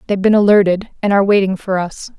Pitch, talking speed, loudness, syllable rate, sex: 195 Hz, 220 wpm, -14 LUFS, 6.9 syllables/s, female